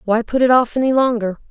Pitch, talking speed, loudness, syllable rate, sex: 240 Hz, 240 wpm, -16 LUFS, 6.1 syllables/s, female